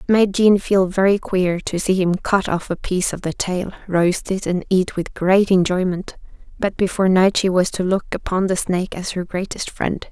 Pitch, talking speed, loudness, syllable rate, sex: 185 Hz, 220 wpm, -19 LUFS, 4.9 syllables/s, female